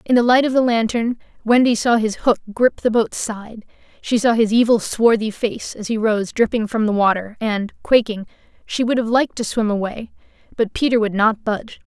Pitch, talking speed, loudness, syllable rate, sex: 225 Hz, 205 wpm, -18 LUFS, 5.2 syllables/s, female